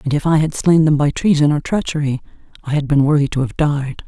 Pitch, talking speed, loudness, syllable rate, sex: 150 Hz, 250 wpm, -16 LUFS, 5.9 syllables/s, female